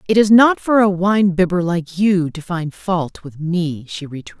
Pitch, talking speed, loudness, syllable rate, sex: 180 Hz, 220 wpm, -16 LUFS, 4.5 syllables/s, female